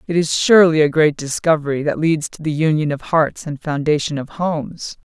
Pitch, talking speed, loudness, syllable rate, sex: 155 Hz, 200 wpm, -17 LUFS, 5.4 syllables/s, female